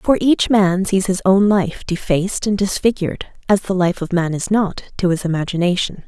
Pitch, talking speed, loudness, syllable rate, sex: 190 Hz, 200 wpm, -17 LUFS, 5.2 syllables/s, female